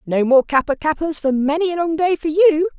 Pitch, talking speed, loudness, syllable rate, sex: 310 Hz, 235 wpm, -17 LUFS, 5.4 syllables/s, female